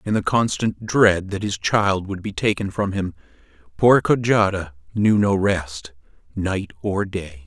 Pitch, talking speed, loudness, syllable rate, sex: 95 Hz, 160 wpm, -20 LUFS, 4.0 syllables/s, male